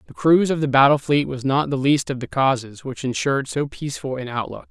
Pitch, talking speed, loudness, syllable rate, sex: 135 Hz, 245 wpm, -20 LUFS, 6.0 syllables/s, male